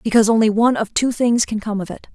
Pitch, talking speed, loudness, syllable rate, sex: 220 Hz, 280 wpm, -17 LUFS, 7.0 syllables/s, female